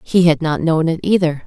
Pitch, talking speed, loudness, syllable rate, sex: 165 Hz, 245 wpm, -16 LUFS, 5.1 syllables/s, female